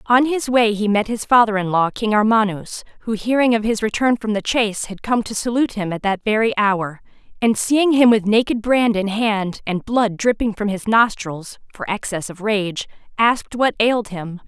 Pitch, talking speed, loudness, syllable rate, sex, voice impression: 215 Hz, 205 wpm, -18 LUFS, 5.0 syllables/s, female, very feminine, slightly young, slightly adult-like, very thin, tensed, slightly powerful, bright, slightly hard, clear, slightly muffled, slightly raspy, very cute, intellectual, very refreshing, sincere, calm, friendly, reassuring, very unique, elegant, wild, very sweet, kind, slightly intense, modest